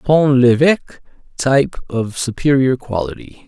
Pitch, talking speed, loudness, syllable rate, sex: 130 Hz, 105 wpm, -16 LUFS, 4.9 syllables/s, male